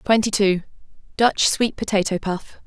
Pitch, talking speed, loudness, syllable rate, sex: 205 Hz, 115 wpm, -20 LUFS, 4.5 syllables/s, female